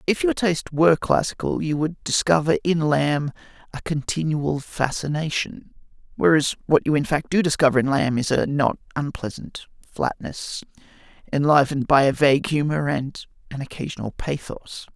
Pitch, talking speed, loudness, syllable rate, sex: 150 Hz, 145 wpm, -22 LUFS, 5.0 syllables/s, male